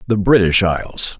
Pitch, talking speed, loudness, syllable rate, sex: 95 Hz, 150 wpm, -15 LUFS, 5.2 syllables/s, male